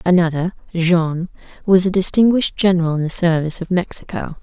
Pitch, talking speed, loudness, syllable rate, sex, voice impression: 175 Hz, 150 wpm, -17 LUFS, 5.9 syllables/s, female, feminine, adult-like, calm, slightly reassuring, elegant